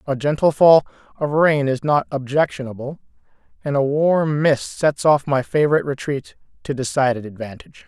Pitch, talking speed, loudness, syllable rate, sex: 140 Hz, 150 wpm, -19 LUFS, 5.3 syllables/s, male